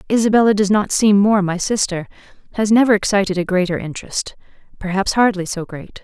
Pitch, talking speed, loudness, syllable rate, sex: 200 Hz, 170 wpm, -17 LUFS, 5.9 syllables/s, female